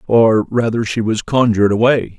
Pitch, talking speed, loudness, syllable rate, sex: 110 Hz, 165 wpm, -15 LUFS, 4.9 syllables/s, male